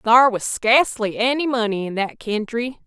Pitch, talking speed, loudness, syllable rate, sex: 230 Hz, 165 wpm, -19 LUFS, 4.6 syllables/s, female